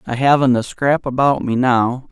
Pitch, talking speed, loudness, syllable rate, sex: 130 Hz, 200 wpm, -16 LUFS, 4.6 syllables/s, male